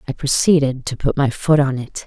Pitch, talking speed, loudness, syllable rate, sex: 140 Hz, 235 wpm, -17 LUFS, 5.2 syllables/s, female